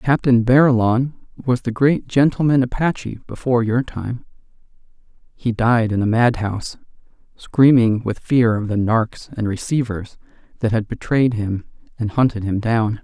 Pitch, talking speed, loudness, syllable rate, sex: 120 Hz, 145 wpm, -18 LUFS, 4.6 syllables/s, male